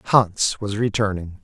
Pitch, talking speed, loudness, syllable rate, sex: 100 Hz, 125 wpm, -21 LUFS, 3.6 syllables/s, male